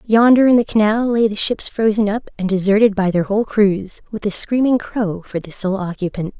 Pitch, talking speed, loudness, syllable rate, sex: 210 Hz, 215 wpm, -17 LUFS, 5.3 syllables/s, female